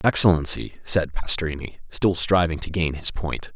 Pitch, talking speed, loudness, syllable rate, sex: 85 Hz, 150 wpm, -21 LUFS, 5.2 syllables/s, male